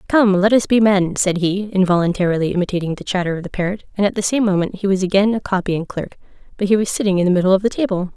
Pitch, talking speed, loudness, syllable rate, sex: 190 Hz, 255 wpm, -17 LUFS, 6.8 syllables/s, female